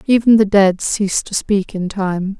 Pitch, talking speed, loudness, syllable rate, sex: 200 Hz, 200 wpm, -16 LUFS, 4.4 syllables/s, female